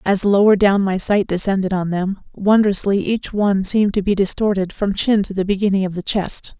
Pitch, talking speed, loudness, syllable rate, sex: 195 Hz, 210 wpm, -17 LUFS, 5.3 syllables/s, female